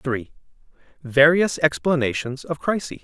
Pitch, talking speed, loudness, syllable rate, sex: 150 Hz, 100 wpm, -20 LUFS, 4.4 syllables/s, male